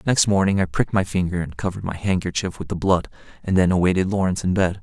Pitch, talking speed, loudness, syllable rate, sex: 95 Hz, 235 wpm, -21 LUFS, 6.9 syllables/s, male